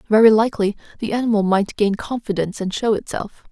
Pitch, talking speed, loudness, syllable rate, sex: 210 Hz, 170 wpm, -19 LUFS, 6.3 syllables/s, female